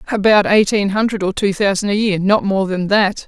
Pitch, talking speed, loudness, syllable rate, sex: 200 Hz, 220 wpm, -15 LUFS, 5.3 syllables/s, female